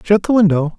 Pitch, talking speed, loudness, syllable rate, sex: 190 Hz, 230 wpm, -14 LUFS, 5.8 syllables/s, male